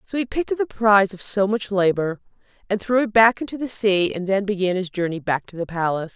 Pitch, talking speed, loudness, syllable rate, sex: 205 Hz, 255 wpm, -21 LUFS, 6.1 syllables/s, female